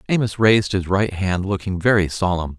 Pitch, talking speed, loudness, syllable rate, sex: 95 Hz, 185 wpm, -19 LUFS, 5.4 syllables/s, male